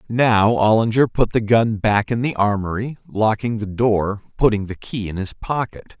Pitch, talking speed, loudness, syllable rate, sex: 110 Hz, 180 wpm, -19 LUFS, 4.6 syllables/s, male